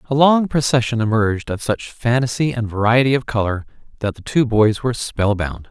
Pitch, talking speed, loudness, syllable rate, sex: 120 Hz, 180 wpm, -18 LUFS, 5.3 syllables/s, male